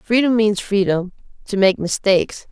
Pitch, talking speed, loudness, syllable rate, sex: 205 Hz, 145 wpm, -18 LUFS, 4.7 syllables/s, female